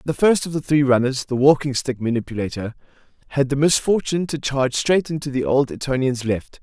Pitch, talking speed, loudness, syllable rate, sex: 135 Hz, 190 wpm, -20 LUFS, 5.8 syllables/s, male